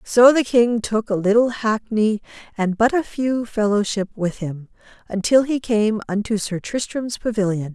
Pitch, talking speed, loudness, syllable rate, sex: 220 Hz, 155 wpm, -20 LUFS, 4.3 syllables/s, female